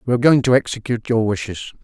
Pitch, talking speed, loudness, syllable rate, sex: 120 Hz, 230 wpm, -18 LUFS, 7.5 syllables/s, male